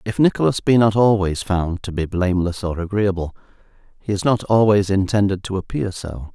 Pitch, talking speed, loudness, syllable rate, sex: 100 Hz, 180 wpm, -19 LUFS, 5.4 syllables/s, male